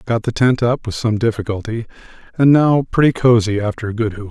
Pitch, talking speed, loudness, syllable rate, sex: 115 Hz, 195 wpm, -16 LUFS, 5.6 syllables/s, male